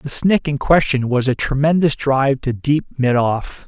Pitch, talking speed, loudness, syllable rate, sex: 140 Hz, 195 wpm, -17 LUFS, 4.5 syllables/s, male